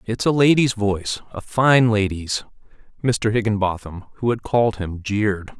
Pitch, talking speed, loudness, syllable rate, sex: 110 Hz, 150 wpm, -20 LUFS, 4.6 syllables/s, male